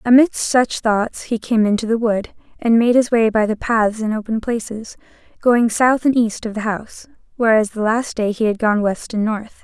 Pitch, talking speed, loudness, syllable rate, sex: 225 Hz, 220 wpm, -18 LUFS, 4.8 syllables/s, female